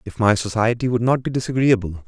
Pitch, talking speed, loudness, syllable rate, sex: 115 Hz, 200 wpm, -19 LUFS, 6.1 syllables/s, male